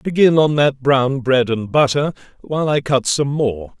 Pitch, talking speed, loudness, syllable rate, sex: 135 Hz, 190 wpm, -17 LUFS, 4.4 syllables/s, male